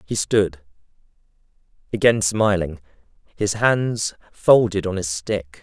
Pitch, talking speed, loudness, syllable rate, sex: 100 Hz, 105 wpm, -20 LUFS, 3.7 syllables/s, male